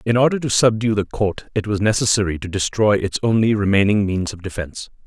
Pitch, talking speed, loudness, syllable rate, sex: 105 Hz, 200 wpm, -19 LUFS, 5.9 syllables/s, male